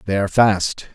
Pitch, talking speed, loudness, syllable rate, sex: 100 Hz, 190 wpm, -18 LUFS, 5.1 syllables/s, male